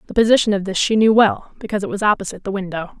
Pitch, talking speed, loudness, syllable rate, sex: 200 Hz, 260 wpm, -17 LUFS, 7.8 syllables/s, female